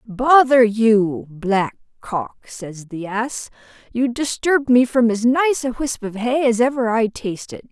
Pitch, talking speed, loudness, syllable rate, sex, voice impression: 235 Hz, 165 wpm, -18 LUFS, 3.8 syllables/s, female, very feminine, adult-like, sincere, friendly, slightly kind